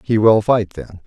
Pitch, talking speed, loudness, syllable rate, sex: 110 Hz, 225 wpm, -15 LUFS, 4.3 syllables/s, male